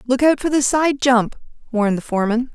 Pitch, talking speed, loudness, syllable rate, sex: 250 Hz, 210 wpm, -18 LUFS, 5.8 syllables/s, female